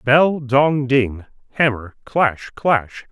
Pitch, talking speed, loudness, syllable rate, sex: 130 Hz, 115 wpm, -18 LUFS, 2.7 syllables/s, male